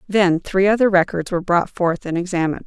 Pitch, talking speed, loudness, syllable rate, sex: 180 Hz, 205 wpm, -18 LUFS, 6.0 syllables/s, female